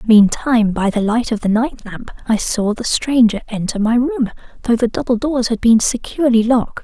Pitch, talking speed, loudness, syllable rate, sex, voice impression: 230 Hz, 200 wpm, -16 LUFS, 5.2 syllables/s, female, feminine, slightly young, relaxed, slightly bright, soft, slightly raspy, cute, slightly refreshing, friendly, reassuring, elegant, kind, modest